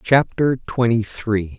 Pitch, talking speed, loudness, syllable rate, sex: 115 Hz, 115 wpm, -20 LUFS, 3.5 syllables/s, male